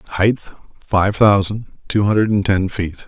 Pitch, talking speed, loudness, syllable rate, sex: 100 Hz, 135 wpm, -17 LUFS, 4.4 syllables/s, male